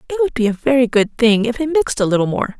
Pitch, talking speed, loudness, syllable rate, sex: 240 Hz, 300 wpm, -16 LUFS, 6.8 syllables/s, female